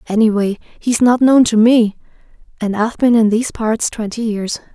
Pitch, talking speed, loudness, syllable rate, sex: 225 Hz, 175 wpm, -15 LUFS, 5.0 syllables/s, female